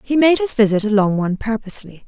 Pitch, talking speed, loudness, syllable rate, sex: 225 Hz, 230 wpm, -17 LUFS, 6.6 syllables/s, female